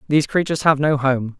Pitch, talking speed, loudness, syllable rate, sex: 145 Hz, 215 wpm, -18 LUFS, 6.5 syllables/s, male